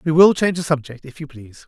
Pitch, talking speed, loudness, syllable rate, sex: 150 Hz, 285 wpm, -17 LUFS, 7.0 syllables/s, male